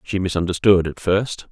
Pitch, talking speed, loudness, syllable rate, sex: 95 Hz, 160 wpm, -19 LUFS, 5.0 syllables/s, male